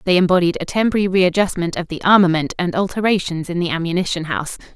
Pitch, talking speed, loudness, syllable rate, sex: 180 Hz, 175 wpm, -18 LUFS, 6.9 syllables/s, female